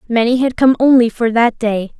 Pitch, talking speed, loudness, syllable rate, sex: 235 Hz, 210 wpm, -13 LUFS, 5.3 syllables/s, female